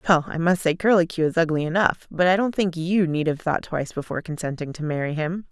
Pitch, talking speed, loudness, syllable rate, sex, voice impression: 170 Hz, 240 wpm, -23 LUFS, 6.1 syllables/s, female, very feminine, slightly young, slightly adult-like, thin, tensed, slightly powerful, bright, hard, very clear, fluent, cute, slightly cool, intellectual, very refreshing, sincere, slightly calm, friendly, reassuring, very elegant, slightly sweet, lively, slightly strict, slightly intense, slightly sharp